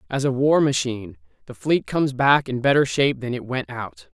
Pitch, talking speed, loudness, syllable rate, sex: 135 Hz, 215 wpm, -21 LUFS, 5.5 syllables/s, male